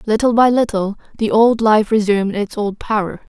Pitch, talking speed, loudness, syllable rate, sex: 215 Hz, 180 wpm, -16 LUFS, 5.1 syllables/s, female